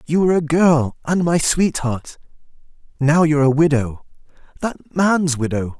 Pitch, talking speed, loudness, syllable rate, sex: 150 Hz, 135 wpm, -18 LUFS, 4.5 syllables/s, male